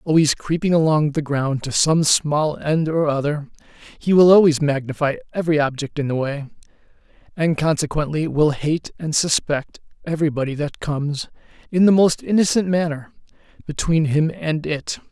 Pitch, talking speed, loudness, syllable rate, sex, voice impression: 155 Hz, 150 wpm, -19 LUFS, 5.0 syllables/s, male, masculine, adult-like, middle-aged, slightly thick, slightly tensed, slightly weak, bright, hard, slightly muffled, fluent, slightly raspy, slightly cool, intellectual, slightly refreshing, sincere, calm, mature, friendly, slightly reassuring, slightly unique, slightly elegant, slightly wild, slightly sweet, lively, kind, slightly modest